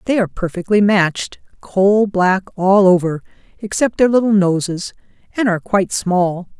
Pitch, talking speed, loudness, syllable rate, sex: 195 Hz, 135 wpm, -16 LUFS, 4.8 syllables/s, female